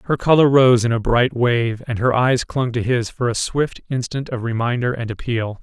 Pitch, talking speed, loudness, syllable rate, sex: 120 Hz, 225 wpm, -18 LUFS, 4.9 syllables/s, male